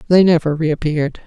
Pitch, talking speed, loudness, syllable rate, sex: 160 Hz, 140 wpm, -16 LUFS, 5.7 syllables/s, female